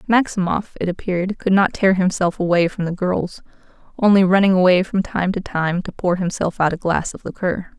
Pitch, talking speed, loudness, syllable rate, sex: 185 Hz, 200 wpm, -19 LUFS, 5.3 syllables/s, female